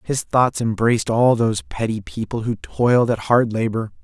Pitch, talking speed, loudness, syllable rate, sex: 115 Hz, 180 wpm, -19 LUFS, 4.9 syllables/s, male